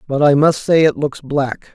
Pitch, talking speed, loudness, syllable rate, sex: 145 Hz, 240 wpm, -15 LUFS, 4.6 syllables/s, male